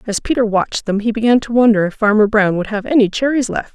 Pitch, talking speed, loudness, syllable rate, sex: 220 Hz, 255 wpm, -15 LUFS, 6.3 syllables/s, female